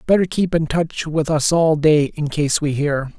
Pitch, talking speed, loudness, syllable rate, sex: 155 Hz, 225 wpm, -18 LUFS, 4.3 syllables/s, male